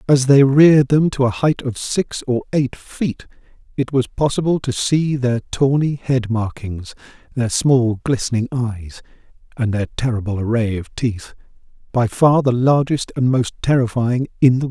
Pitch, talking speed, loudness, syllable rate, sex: 125 Hz, 165 wpm, -18 LUFS, 4.4 syllables/s, male